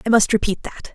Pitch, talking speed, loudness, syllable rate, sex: 215 Hz, 255 wpm, -19 LUFS, 6.2 syllables/s, female